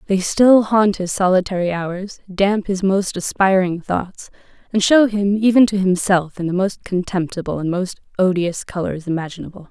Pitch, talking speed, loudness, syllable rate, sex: 190 Hz, 160 wpm, -18 LUFS, 4.7 syllables/s, female